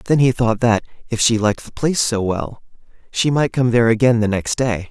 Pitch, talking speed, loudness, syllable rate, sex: 115 Hz, 230 wpm, -18 LUFS, 5.6 syllables/s, male